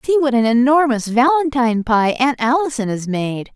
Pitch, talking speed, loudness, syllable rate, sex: 255 Hz, 170 wpm, -16 LUFS, 5.1 syllables/s, female